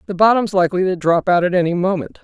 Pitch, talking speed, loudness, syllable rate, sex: 185 Hz, 240 wpm, -16 LUFS, 6.8 syllables/s, female